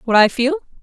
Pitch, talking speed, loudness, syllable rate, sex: 265 Hz, 220 wpm, -16 LUFS, 5.9 syllables/s, female